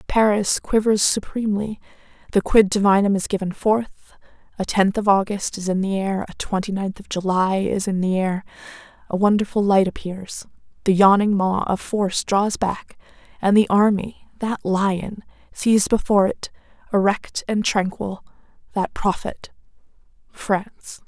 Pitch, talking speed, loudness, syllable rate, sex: 200 Hz, 145 wpm, -20 LUFS, 4.5 syllables/s, female